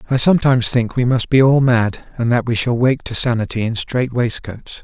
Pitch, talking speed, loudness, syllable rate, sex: 120 Hz, 225 wpm, -16 LUFS, 5.3 syllables/s, male